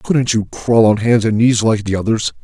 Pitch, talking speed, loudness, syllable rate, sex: 110 Hz, 245 wpm, -14 LUFS, 4.7 syllables/s, male